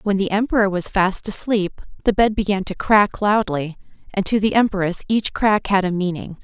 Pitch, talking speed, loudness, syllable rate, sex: 200 Hz, 195 wpm, -19 LUFS, 4.9 syllables/s, female